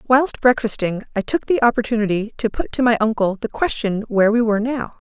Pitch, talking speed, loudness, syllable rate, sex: 225 Hz, 200 wpm, -19 LUFS, 5.9 syllables/s, female